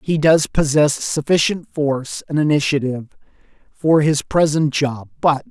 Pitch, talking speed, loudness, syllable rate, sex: 145 Hz, 130 wpm, -18 LUFS, 4.6 syllables/s, male